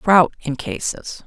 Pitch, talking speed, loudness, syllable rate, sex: 165 Hz, 145 wpm, -20 LUFS, 3.5 syllables/s, female